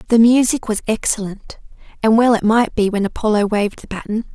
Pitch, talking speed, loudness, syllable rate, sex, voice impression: 215 Hz, 195 wpm, -17 LUFS, 5.8 syllables/s, female, very feminine, slightly adult-like, very thin, slightly tensed, slightly weak, very bright, slightly dark, soft, clear, fluent, slightly raspy, very cute, intellectual, very refreshing, sincere, slightly calm, very friendly, very reassuring, very unique, very elegant, slightly wild, very sweet, lively, kind, slightly intense, slightly modest, light